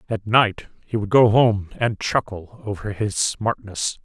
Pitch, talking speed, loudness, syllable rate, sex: 105 Hz, 165 wpm, -21 LUFS, 3.9 syllables/s, male